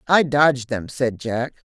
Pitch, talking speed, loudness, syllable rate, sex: 135 Hz, 175 wpm, -20 LUFS, 4.3 syllables/s, female